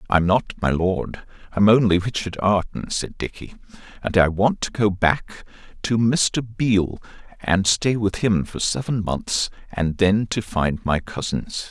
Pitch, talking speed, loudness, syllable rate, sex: 100 Hz, 165 wpm, -21 LUFS, 4.0 syllables/s, male